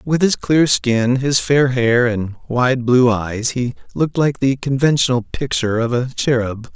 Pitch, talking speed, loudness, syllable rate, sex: 125 Hz, 180 wpm, -17 LUFS, 4.3 syllables/s, male